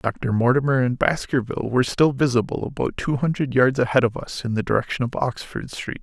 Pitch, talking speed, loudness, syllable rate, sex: 130 Hz, 200 wpm, -22 LUFS, 5.8 syllables/s, male